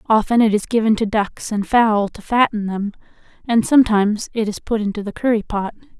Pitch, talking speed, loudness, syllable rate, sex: 215 Hz, 200 wpm, -18 LUFS, 5.5 syllables/s, female